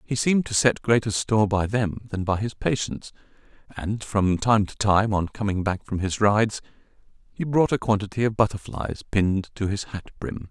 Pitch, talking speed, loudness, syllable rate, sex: 105 Hz, 195 wpm, -24 LUFS, 5.1 syllables/s, male